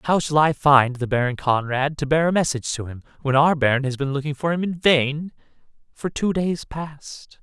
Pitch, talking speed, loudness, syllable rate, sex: 145 Hz, 220 wpm, -21 LUFS, 5.1 syllables/s, male